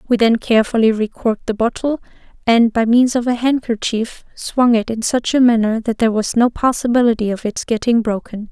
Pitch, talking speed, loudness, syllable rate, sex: 230 Hz, 190 wpm, -16 LUFS, 5.5 syllables/s, female